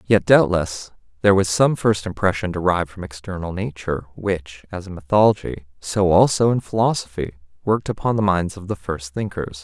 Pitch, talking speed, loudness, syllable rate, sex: 95 Hz, 170 wpm, -20 LUFS, 5.4 syllables/s, male